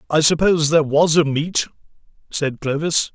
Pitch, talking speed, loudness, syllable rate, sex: 155 Hz, 155 wpm, -18 LUFS, 5.2 syllables/s, male